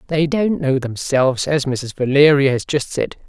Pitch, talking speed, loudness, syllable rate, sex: 145 Hz, 165 wpm, -17 LUFS, 4.7 syllables/s, female